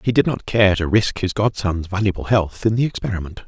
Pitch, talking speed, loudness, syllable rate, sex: 100 Hz, 225 wpm, -19 LUFS, 5.6 syllables/s, male